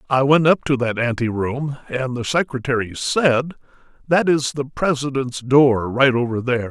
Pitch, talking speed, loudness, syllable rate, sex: 135 Hz, 160 wpm, -19 LUFS, 4.6 syllables/s, male